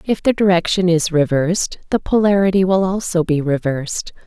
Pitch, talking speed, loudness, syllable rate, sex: 180 Hz, 155 wpm, -17 LUFS, 5.3 syllables/s, female